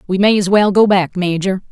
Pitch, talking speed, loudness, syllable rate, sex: 195 Hz, 245 wpm, -14 LUFS, 5.3 syllables/s, female